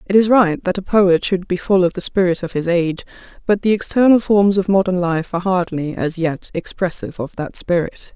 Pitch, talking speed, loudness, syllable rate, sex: 185 Hz, 220 wpm, -17 LUFS, 5.4 syllables/s, female